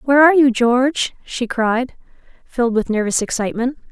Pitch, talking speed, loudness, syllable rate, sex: 245 Hz, 155 wpm, -17 LUFS, 5.6 syllables/s, female